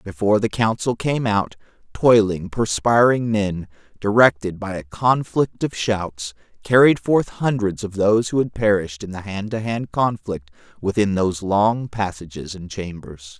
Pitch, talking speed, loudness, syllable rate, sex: 105 Hz, 150 wpm, -20 LUFS, 4.5 syllables/s, male